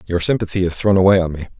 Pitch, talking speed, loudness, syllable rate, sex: 90 Hz, 265 wpm, -17 LUFS, 7.5 syllables/s, male